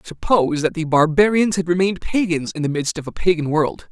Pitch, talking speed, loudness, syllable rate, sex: 170 Hz, 215 wpm, -19 LUFS, 5.8 syllables/s, male